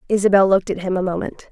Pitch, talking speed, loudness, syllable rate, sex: 190 Hz, 235 wpm, -18 LUFS, 7.5 syllables/s, female